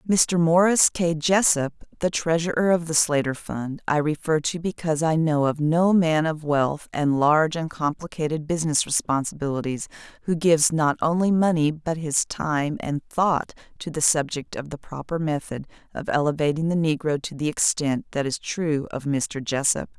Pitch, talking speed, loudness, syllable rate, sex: 155 Hz, 170 wpm, -23 LUFS, 4.8 syllables/s, female